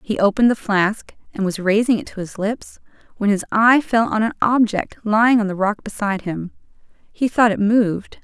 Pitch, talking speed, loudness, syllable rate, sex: 210 Hz, 205 wpm, -18 LUFS, 5.3 syllables/s, female